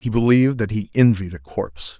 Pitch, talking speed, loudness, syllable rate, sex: 105 Hz, 210 wpm, -19 LUFS, 5.7 syllables/s, male